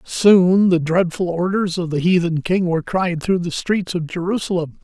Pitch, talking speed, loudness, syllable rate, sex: 175 Hz, 185 wpm, -18 LUFS, 4.7 syllables/s, male